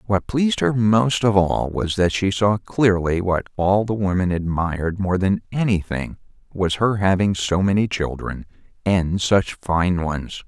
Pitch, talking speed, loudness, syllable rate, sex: 95 Hz, 165 wpm, -20 LUFS, 4.2 syllables/s, male